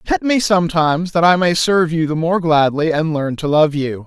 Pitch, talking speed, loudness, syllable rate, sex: 165 Hz, 235 wpm, -15 LUFS, 5.3 syllables/s, male